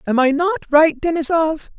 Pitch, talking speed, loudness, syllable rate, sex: 315 Hz, 170 wpm, -17 LUFS, 4.6 syllables/s, female